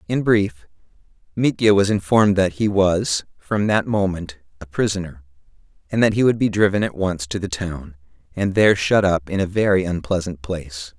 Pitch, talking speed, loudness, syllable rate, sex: 95 Hz, 180 wpm, -19 LUFS, 5.1 syllables/s, male